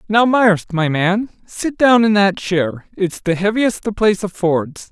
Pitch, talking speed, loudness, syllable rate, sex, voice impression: 200 Hz, 170 wpm, -16 LUFS, 4.0 syllables/s, male, masculine, adult-like, slightly bright, refreshing, slightly unique